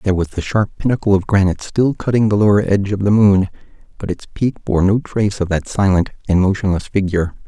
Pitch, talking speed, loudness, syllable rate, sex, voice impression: 100 Hz, 215 wpm, -16 LUFS, 6.3 syllables/s, male, masculine, slightly middle-aged, slightly powerful, slightly mature, reassuring, elegant, sweet